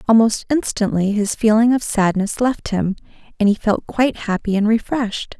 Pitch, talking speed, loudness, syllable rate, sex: 220 Hz, 165 wpm, -18 LUFS, 5.0 syllables/s, female